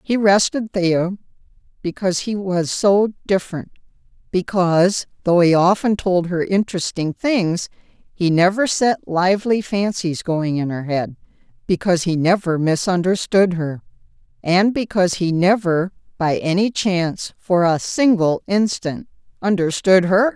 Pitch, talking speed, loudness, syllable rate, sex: 185 Hz, 125 wpm, -18 LUFS, 4.4 syllables/s, female